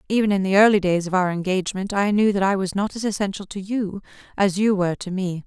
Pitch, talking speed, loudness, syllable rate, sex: 195 Hz, 250 wpm, -21 LUFS, 6.3 syllables/s, female